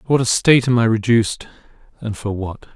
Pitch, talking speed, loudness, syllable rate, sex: 115 Hz, 220 wpm, -17 LUFS, 6.3 syllables/s, male